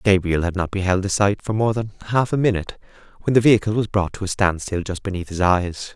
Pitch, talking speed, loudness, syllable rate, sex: 100 Hz, 240 wpm, -20 LUFS, 6.2 syllables/s, male